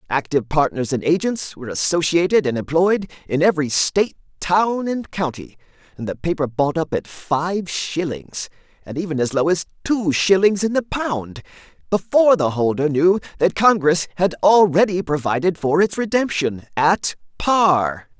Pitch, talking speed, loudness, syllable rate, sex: 165 Hz, 150 wpm, -19 LUFS, 4.7 syllables/s, male